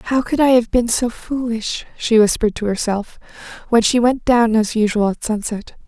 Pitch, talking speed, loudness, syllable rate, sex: 230 Hz, 195 wpm, -17 LUFS, 4.9 syllables/s, female